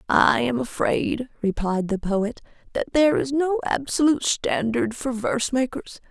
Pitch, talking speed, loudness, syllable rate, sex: 245 Hz, 145 wpm, -23 LUFS, 4.6 syllables/s, female